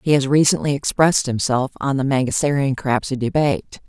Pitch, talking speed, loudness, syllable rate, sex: 135 Hz, 155 wpm, -19 LUFS, 5.7 syllables/s, female